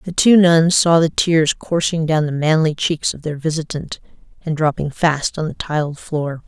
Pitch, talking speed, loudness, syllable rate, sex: 155 Hz, 195 wpm, -17 LUFS, 4.5 syllables/s, female